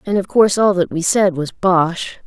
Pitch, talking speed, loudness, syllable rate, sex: 185 Hz, 240 wpm, -16 LUFS, 4.8 syllables/s, female